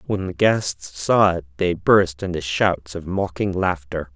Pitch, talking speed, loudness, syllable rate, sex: 90 Hz, 175 wpm, -21 LUFS, 3.9 syllables/s, male